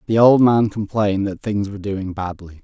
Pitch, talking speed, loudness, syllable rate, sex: 100 Hz, 205 wpm, -18 LUFS, 5.3 syllables/s, male